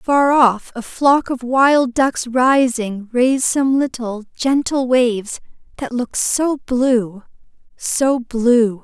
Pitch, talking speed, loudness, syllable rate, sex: 250 Hz, 130 wpm, -17 LUFS, 3.1 syllables/s, female